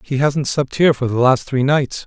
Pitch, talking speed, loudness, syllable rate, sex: 135 Hz, 260 wpm, -17 LUFS, 5.1 syllables/s, male